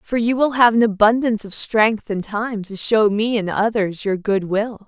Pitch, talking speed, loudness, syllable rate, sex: 215 Hz, 220 wpm, -18 LUFS, 4.6 syllables/s, female